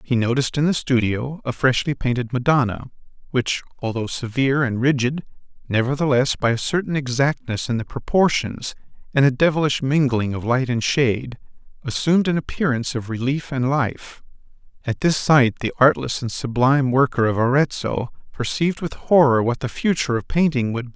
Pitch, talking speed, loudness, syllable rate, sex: 130 Hz, 165 wpm, -20 LUFS, 5.4 syllables/s, male